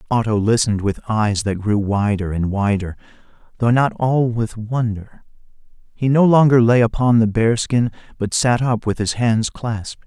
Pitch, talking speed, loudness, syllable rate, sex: 115 Hz, 175 wpm, -18 LUFS, 4.7 syllables/s, male